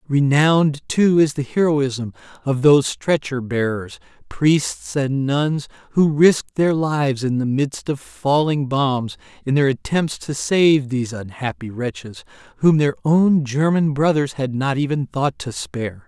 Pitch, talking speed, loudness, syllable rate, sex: 140 Hz, 155 wpm, -19 LUFS, 4.1 syllables/s, male